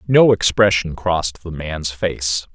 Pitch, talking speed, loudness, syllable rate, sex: 85 Hz, 140 wpm, -18 LUFS, 3.9 syllables/s, male